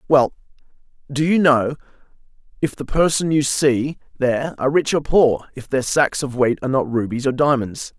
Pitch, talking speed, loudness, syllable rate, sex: 135 Hz, 180 wpm, -19 LUFS, 5.1 syllables/s, male